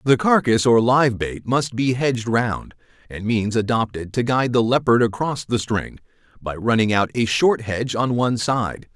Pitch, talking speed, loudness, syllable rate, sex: 120 Hz, 190 wpm, -20 LUFS, 4.9 syllables/s, male